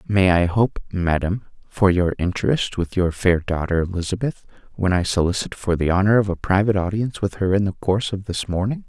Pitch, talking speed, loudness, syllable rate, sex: 95 Hz, 205 wpm, -21 LUFS, 5.7 syllables/s, male